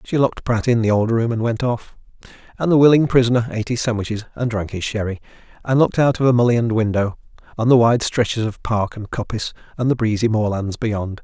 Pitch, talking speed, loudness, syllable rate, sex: 115 Hz, 220 wpm, -19 LUFS, 6.2 syllables/s, male